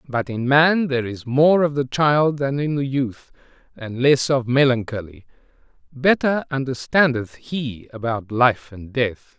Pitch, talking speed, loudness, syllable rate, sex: 130 Hz, 155 wpm, -20 LUFS, 4.1 syllables/s, male